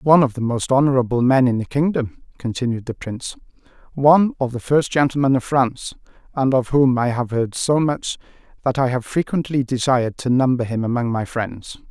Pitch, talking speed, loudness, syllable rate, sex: 130 Hz, 190 wpm, -19 LUFS, 5.5 syllables/s, male